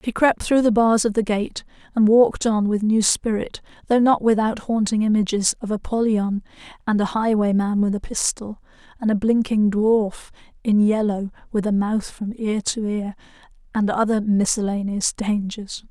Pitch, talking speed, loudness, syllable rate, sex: 215 Hz, 165 wpm, -20 LUFS, 4.7 syllables/s, female